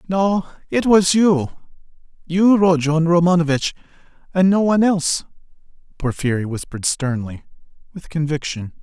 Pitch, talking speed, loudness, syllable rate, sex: 165 Hz, 110 wpm, -18 LUFS, 4.9 syllables/s, male